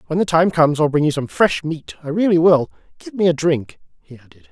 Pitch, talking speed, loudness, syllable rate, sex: 155 Hz, 255 wpm, -17 LUFS, 5.9 syllables/s, male